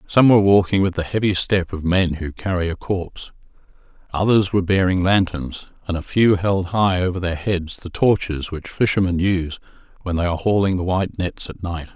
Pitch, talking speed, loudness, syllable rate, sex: 90 Hz, 195 wpm, -20 LUFS, 5.4 syllables/s, male